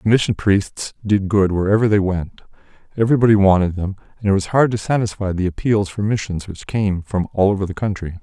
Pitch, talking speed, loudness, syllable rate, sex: 100 Hz, 205 wpm, -18 LUFS, 5.8 syllables/s, male